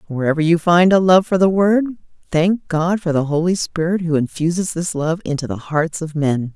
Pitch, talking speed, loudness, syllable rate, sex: 170 Hz, 210 wpm, -17 LUFS, 5.1 syllables/s, female